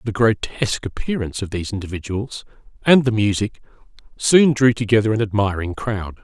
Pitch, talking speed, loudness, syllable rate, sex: 110 Hz, 145 wpm, -19 LUFS, 5.7 syllables/s, male